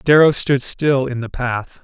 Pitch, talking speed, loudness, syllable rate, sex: 130 Hz, 195 wpm, -17 LUFS, 4.1 syllables/s, male